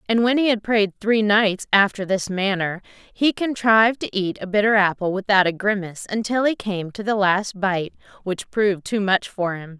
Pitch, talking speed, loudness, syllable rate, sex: 200 Hz, 200 wpm, -20 LUFS, 4.9 syllables/s, female